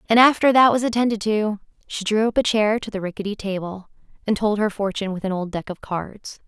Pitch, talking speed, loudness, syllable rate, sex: 210 Hz, 230 wpm, -21 LUFS, 5.9 syllables/s, female